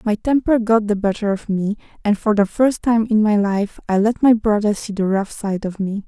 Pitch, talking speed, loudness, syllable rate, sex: 210 Hz, 245 wpm, -18 LUFS, 5.0 syllables/s, female